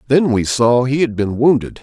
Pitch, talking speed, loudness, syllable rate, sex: 125 Hz, 230 wpm, -15 LUFS, 4.9 syllables/s, male